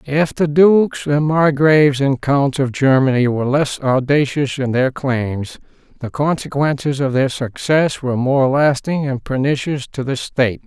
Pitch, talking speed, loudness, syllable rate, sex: 140 Hz, 150 wpm, -16 LUFS, 4.4 syllables/s, male